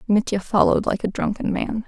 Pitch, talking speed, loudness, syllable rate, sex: 210 Hz, 190 wpm, -21 LUFS, 5.9 syllables/s, female